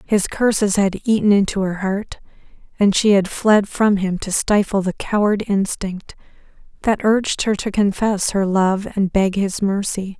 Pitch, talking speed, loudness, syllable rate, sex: 200 Hz, 170 wpm, -18 LUFS, 4.3 syllables/s, female